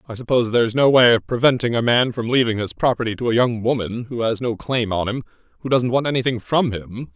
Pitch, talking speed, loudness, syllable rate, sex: 120 Hz, 235 wpm, -19 LUFS, 6.1 syllables/s, male